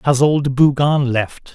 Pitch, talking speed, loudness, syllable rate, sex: 135 Hz, 155 wpm, -15 LUFS, 3.6 syllables/s, male